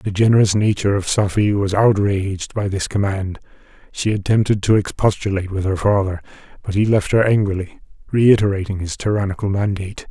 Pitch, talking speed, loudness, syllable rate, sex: 100 Hz, 155 wpm, -18 LUFS, 5.8 syllables/s, male